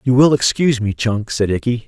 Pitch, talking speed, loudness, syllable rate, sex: 120 Hz, 225 wpm, -16 LUFS, 5.7 syllables/s, male